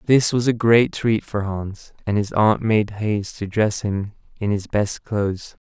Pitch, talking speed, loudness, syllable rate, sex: 105 Hz, 200 wpm, -21 LUFS, 4.1 syllables/s, male